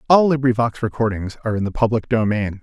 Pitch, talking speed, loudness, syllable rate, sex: 115 Hz, 185 wpm, -19 LUFS, 6.5 syllables/s, male